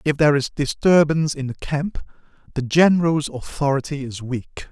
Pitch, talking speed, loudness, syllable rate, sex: 145 Hz, 155 wpm, -20 LUFS, 5.2 syllables/s, male